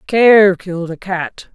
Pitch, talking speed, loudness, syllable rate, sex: 190 Hz, 155 wpm, -14 LUFS, 3.6 syllables/s, female